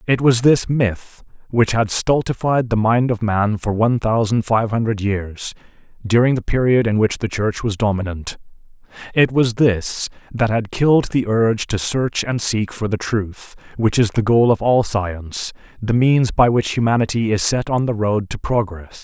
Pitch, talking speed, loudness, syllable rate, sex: 110 Hz, 190 wpm, -18 LUFS, 4.0 syllables/s, male